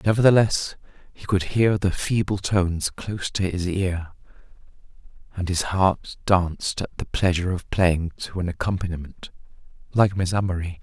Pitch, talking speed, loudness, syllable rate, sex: 90 Hz, 145 wpm, -23 LUFS, 5.0 syllables/s, male